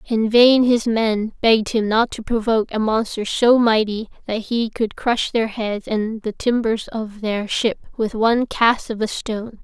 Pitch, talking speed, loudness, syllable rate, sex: 225 Hz, 195 wpm, -19 LUFS, 4.3 syllables/s, female